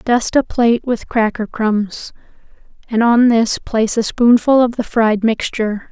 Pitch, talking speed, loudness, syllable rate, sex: 230 Hz, 160 wpm, -15 LUFS, 4.4 syllables/s, female